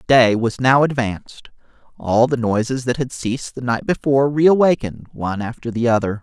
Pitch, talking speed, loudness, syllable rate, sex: 125 Hz, 175 wpm, -18 LUFS, 5.4 syllables/s, male